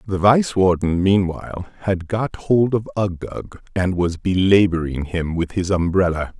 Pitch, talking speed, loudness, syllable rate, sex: 95 Hz, 150 wpm, -19 LUFS, 4.3 syllables/s, male